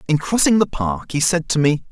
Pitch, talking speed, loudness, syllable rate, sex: 155 Hz, 250 wpm, -18 LUFS, 5.3 syllables/s, male